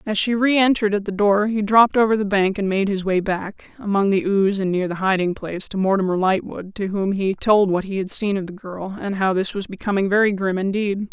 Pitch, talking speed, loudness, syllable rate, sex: 200 Hz, 250 wpm, -20 LUFS, 5.7 syllables/s, female